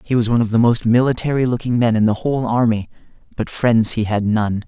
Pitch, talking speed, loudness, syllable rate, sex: 115 Hz, 230 wpm, -17 LUFS, 6.1 syllables/s, male